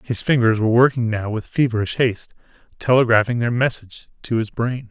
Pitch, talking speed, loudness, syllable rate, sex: 115 Hz, 170 wpm, -19 LUFS, 6.0 syllables/s, male